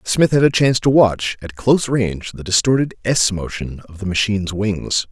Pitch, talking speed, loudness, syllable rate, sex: 105 Hz, 200 wpm, -17 LUFS, 5.1 syllables/s, male